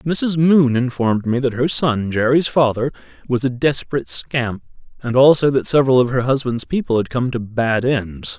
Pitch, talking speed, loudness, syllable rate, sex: 125 Hz, 170 wpm, -17 LUFS, 5.0 syllables/s, male